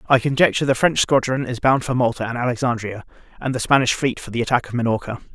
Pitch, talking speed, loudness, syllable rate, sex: 125 Hz, 225 wpm, -20 LUFS, 6.9 syllables/s, male